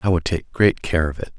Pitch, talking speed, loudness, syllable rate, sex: 85 Hz, 305 wpm, -21 LUFS, 5.6 syllables/s, male